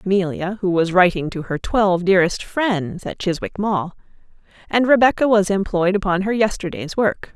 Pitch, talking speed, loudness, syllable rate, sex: 190 Hz, 165 wpm, -19 LUFS, 5.2 syllables/s, female